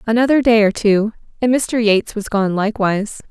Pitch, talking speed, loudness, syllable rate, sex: 215 Hz, 180 wpm, -16 LUFS, 5.6 syllables/s, female